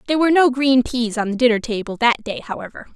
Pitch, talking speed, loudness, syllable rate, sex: 245 Hz, 245 wpm, -18 LUFS, 6.9 syllables/s, female